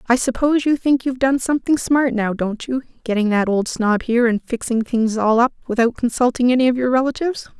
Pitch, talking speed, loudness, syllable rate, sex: 245 Hz, 215 wpm, -18 LUFS, 6.0 syllables/s, female